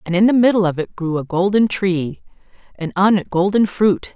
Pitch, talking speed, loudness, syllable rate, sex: 190 Hz, 215 wpm, -17 LUFS, 5.2 syllables/s, female